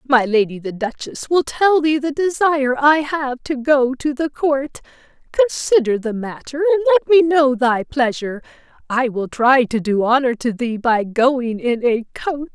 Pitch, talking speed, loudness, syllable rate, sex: 265 Hz, 180 wpm, -17 LUFS, 4.5 syllables/s, female